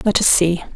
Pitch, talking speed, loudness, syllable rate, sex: 185 Hz, 240 wpm, -15 LUFS, 5.5 syllables/s, female